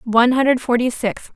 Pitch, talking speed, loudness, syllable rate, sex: 245 Hz, 175 wpm, -17 LUFS, 5.7 syllables/s, female